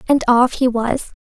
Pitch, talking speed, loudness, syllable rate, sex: 245 Hz, 195 wpm, -16 LUFS, 4.3 syllables/s, female